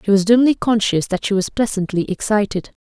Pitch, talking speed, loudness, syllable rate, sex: 205 Hz, 190 wpm, -18 LUFS, 5.7 syllables/s, female